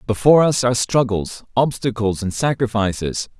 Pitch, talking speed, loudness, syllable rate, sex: 115 Hz, 125 wpm, -18 LUFS, 5.2 syllables/s, male